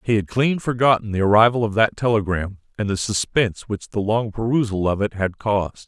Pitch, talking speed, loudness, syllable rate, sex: 105 Hz, 205 wpm, -20 LUFS, 5.6 syllables/s, male